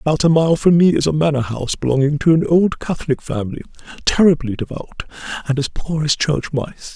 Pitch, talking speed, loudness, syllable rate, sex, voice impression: 150 Hz, 200 wpm, -17 LUFS, 6.0 syllables/s, male, very masculine, very adult-like, slightly old, thick, tensed, powerful, slightly dark, hard, muffled, slightly fluent, raspy, slightly cool, intellectual, sincere, slightly calm, very mature, slightly friendly, very unique, slightly elegant, wild, slightly sweet, slightly lively, kind, modest